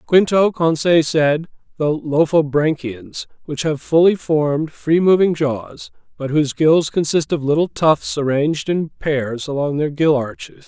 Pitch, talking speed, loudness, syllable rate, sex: 150 Hz, 145 wpm, -17 LUFS, 4.2 syllables/s, male